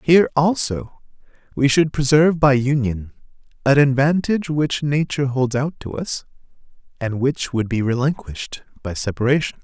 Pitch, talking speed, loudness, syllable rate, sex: 135 Hz, 135 wpm, -19 LUFS, 5.1 syllables/s, male